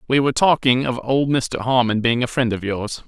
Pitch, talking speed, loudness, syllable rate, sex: 125 Hz, 235 wpm, -19 LUFS, 5.3 syllables/s, male